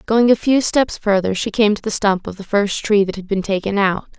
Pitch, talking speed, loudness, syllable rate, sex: 205 Hz, 270 wpm, -17 LUFS, 5.3 syllables/s, female